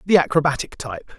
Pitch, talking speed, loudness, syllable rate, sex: 150 Hz, 150 wpm, -21 LUFS, 6.4 syllables/s, male